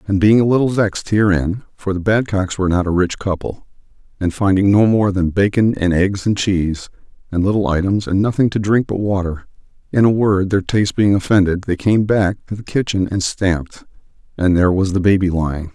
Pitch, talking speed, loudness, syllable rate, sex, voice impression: 95 Hz, 205 wpm, -16 LUFS, 5.0 syllables/s, male, very masculine, very adult-like, thick, slightly muffled, cool, intellectual, slightly calm